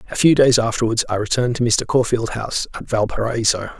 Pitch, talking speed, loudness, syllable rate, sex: 115 Hz, 190 wpm, -18 LUFS, 6.1 syllables/s, male